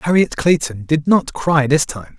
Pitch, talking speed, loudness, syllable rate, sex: 150 Hz, 190 wpm, -16 LUFS, 4.4 syllables/s, male